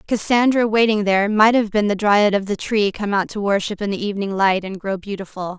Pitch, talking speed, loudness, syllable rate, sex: 205 Hz, 235 wpm, -18 LUFS, 5.7 syllables/s, female